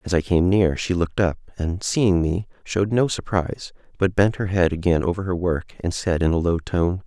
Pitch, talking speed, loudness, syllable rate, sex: 90 Hz, 230 wpm, -22 LUFS, 5.3 syllables/s, male